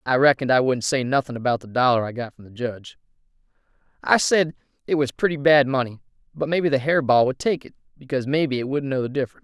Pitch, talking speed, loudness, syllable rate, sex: 135 Hz, 230 wpm, -21 LUFS, 4.6 syllables/s, male